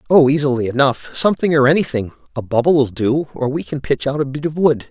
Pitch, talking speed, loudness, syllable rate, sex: 140 Hz, 210 wpm, -17 LUFS, 5.9 syllables/s, male